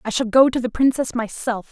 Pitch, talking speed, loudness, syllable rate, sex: 240 Hz, 245 wpm, -19 LUFS, 5.6 syllables/s, female